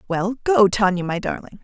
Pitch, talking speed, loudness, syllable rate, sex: 205 Hz, 185 wpm, -20 LUFS, 5.1 syllables/s, female